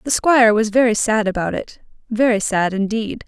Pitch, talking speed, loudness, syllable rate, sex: 220 Hz, 165 wpm, -17 LUFS, 5.3 syllables/s, female